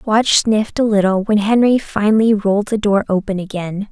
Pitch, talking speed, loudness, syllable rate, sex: 210 Hz, 185 wpm, -15 LUFS, 5.3 syllables/s, female